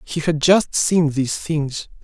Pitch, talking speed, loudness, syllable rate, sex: 155 Hz, 175 wpm, -19 LUFS, 3.9 syllables/s, male